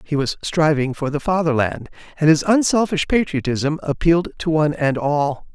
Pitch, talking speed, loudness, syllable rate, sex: 155 Hz, 160 wpm, -19 LUFS, 5.1 syllables/s, male